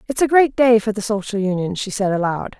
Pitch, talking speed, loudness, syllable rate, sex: 215 Hz, 255 wpm, -18 LUFS, 5.8 syllables/s, female